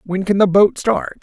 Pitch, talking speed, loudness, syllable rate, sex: 175 Hz, 245 wpm, -15 LUFS, 4.5 syllables/s, male